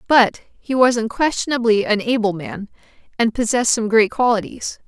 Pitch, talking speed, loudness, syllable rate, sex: 230 Hz, 150 wpm, -18 LUFS, 5.1 syllables/s, female